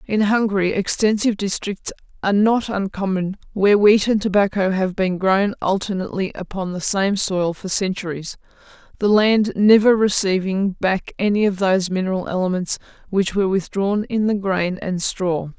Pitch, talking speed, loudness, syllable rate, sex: 195 Hz, 150 wpm, -19 LUFS, 5.0 syllables/s, female